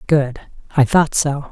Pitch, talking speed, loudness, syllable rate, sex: 145 Hz, 160 wpm, -17 LUFS, 3.7 syllables/s, female